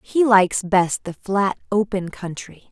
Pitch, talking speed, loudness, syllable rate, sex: 195 Hz, 155 wpm, -20 LUFS, 4.0 syllables/s, female